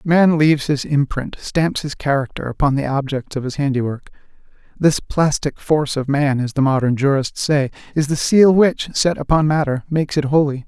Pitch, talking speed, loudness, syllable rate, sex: 145 Hz, 185 wpm, -18 LUFS, 5.1 syllables/s, male